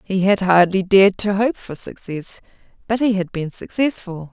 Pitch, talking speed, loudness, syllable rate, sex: 195 Hz, 180 wpm, -18 LUFS, 4.8 syllables/s, female